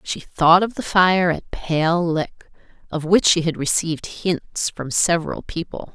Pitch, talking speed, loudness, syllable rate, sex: 170 Hz, 170 wpm, -20 LUFS, 4.1 syllables/s, female